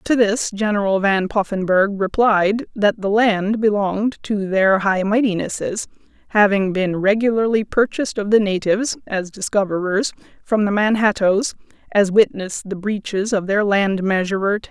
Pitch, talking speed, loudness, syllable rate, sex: 205 Hz, 145 wpm, -18 LUFS, 4.8 syllables/s, female